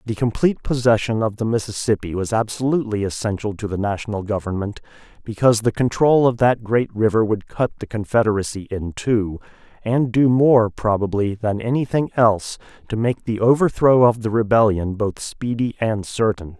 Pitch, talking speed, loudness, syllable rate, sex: 110 Hz, 160 wpm, -20 LUFS, 5.3 syllables/s, male